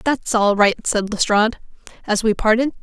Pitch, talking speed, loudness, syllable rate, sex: 220 Hz, 170 wpm, -18 LUFS, 5.1 syllables/s, female